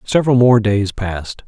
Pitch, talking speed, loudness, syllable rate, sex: 110 Hz, 160 wpm, -15 LUFS, 5.1 syllables/s, male